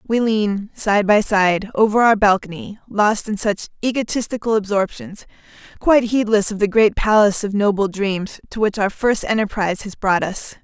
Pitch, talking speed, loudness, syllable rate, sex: 210 Hz, 170 wpm, -18 LUFS, 5.0 syllables/s, female